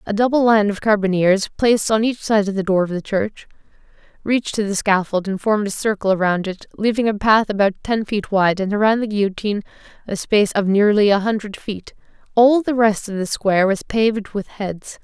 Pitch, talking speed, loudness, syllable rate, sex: 205 Hz, 210 wpm, -18 LUFS, 5.6 syllables/s, female